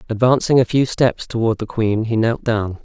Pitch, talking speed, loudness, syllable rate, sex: 115 Hz, 210 wpm, -18 LUFS, 4.9 syllables/s, male